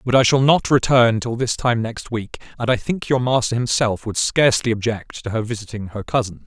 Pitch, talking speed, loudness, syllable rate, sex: 115 Hz, 225 wpm, -19 LUFS, 5.3 syllables/s, male